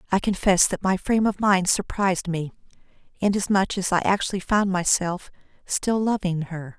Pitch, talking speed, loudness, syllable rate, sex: 190 Hz, 160 wpm, -23 LUFS, 5.1 syllables/s, female